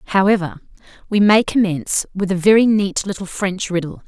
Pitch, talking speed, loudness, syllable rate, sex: 190 Hz, 160 wpm, -17 LUFS, 5.2 syllables/s, female